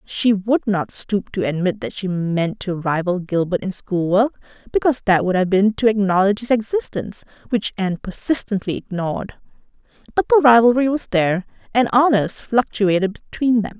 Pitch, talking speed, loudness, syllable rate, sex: 205 Hz, 160 wpm, -19 LUFS, 5.3 syllables/s, female